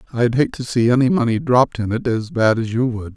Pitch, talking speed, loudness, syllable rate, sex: 120 Hz, 265 wpm, -18 LUFS, 5.8 syllables/s, male